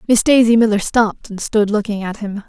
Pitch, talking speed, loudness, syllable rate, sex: 215 Hz, 220 wpm, -15 LUFS, 5.7 syllables/s, female